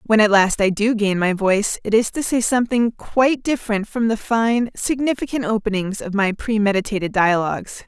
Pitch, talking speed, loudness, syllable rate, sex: 220 Hz, 185 wpm, -19 LUFS, 5.3 syllables/s, female